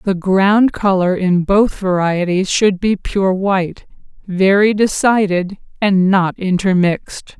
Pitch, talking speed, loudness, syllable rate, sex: 190 Hz, 120 wpm, -15 LUFS, 3.8 syllables/s, female